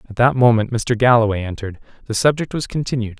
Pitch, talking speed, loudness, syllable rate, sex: 120 Hz, 190 wpm, -17 LUFS, 6.5 syllables/s, male